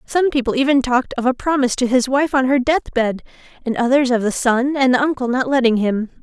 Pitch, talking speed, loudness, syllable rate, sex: 255 Hz, 230 wpm, -17 LUFS, 5.9 syllables/s, female